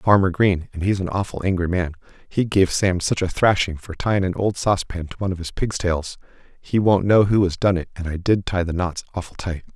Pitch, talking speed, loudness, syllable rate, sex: 95 Hz, 250 wpm, -21 LUFS, 5.8 syllables/s, male